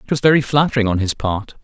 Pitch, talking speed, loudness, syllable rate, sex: 120 Hz, 255 wpm, -17 LUFS, 6.7 syllables/s, male